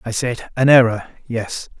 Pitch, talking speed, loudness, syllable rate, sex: 120 Hz, 135 wpm, -17 LUFS, 4.4 syllables/s, male